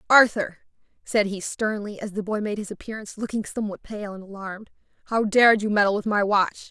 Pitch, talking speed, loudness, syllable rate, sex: 210 Hz, 195 wpm, -24 LUFS, 6.2 syllables/s, female